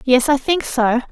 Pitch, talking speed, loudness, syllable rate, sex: 265 Hz, 215 wpm, -17 LUFS, 4.3 syllables/s, female